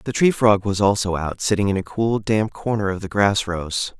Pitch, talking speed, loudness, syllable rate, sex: 100 Hz, 240 wpm, -20 LUFS, 4.9 syllables/s, male